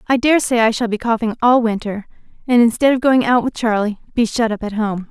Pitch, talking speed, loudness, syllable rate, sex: 230 Hz, 245 wpm, -16 LUFS, 5.7 syllables/s, female